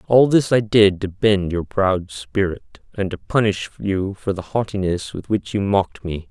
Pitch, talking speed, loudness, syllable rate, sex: 100 Hz, 200 wpm, -20 LUFS, 4.4 syllables/s, male